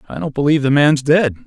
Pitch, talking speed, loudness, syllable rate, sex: 145 Hz, 245 wpm, -15 LUFS, 6.6 syllables/s, male